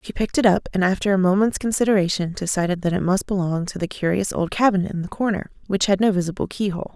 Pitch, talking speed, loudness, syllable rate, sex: 190 Hz, 235 wpm, -21 LUFS, 6.8 syllables/s, female